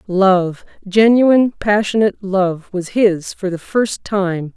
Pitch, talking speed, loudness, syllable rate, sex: 195 Hz, 130 wpm, -16 LUFS, 3.7 syllables/s, female